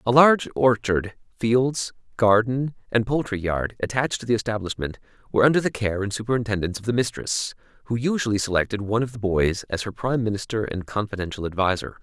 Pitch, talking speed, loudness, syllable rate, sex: 110 Hz, 175 wpm, -23 LUFS, 6.2 syllables/s, male